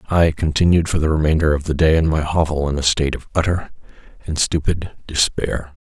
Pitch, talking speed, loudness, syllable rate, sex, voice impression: 80 Hz, 195 wpm, -18 LUFS, 5.6 syllables/s, male, masculine, slightly old, thick, slightly halting, sincere, very calm, slightly wild